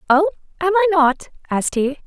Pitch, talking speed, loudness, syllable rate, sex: 290 Hz, 175 wpm, -18 LUFS, 5.5 syllables/s, female